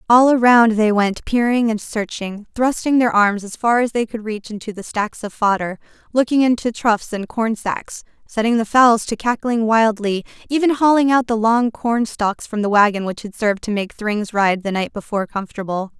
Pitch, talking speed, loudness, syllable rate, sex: 220 Hz, 205 wpm, -18 LUFS, 5.0 syllables/s, female